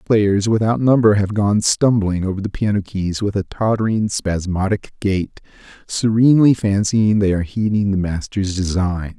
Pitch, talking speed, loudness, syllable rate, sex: 100 Hz, 150 wpm, -17 LUFS, 4.7 syllables/s, male